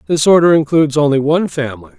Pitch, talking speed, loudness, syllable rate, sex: 150 Hz, 180 wpm, -13 LUFS, 7.3 syllables/s, male